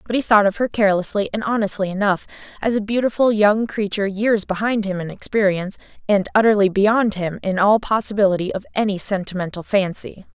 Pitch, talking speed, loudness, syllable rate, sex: 205 Hz, 175 wpm, -19 LUFS, 5.9 syllables/s, female